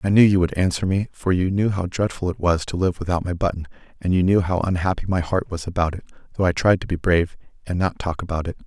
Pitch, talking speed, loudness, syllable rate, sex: 90 Hz, 270 wpm, -22 LUFS, 6.4 syllables/s, male